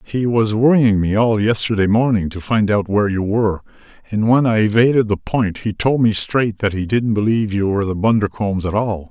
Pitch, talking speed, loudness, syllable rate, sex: 105 Hz, 215 wpm, -17 LUFS, 5.5 syllables/s, male